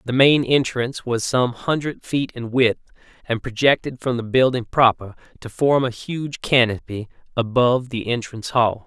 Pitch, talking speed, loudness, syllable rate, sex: 125 Hz, 160 wpm, -20 LUFS, 4.7 syllables/s, male